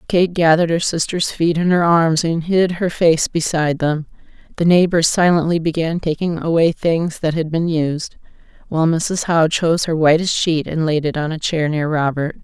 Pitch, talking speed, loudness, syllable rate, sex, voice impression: 165 Hz, 195 wpm, -17 LUFS, 5.0 syllables/s, female, feminine, very adult-like, slightly thick, slightly cool, intellectual, calm, elegant